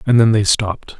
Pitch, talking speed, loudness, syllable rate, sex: 110 Hz, 240 wpm, -15 LUFS, 5.8 syllables/s, male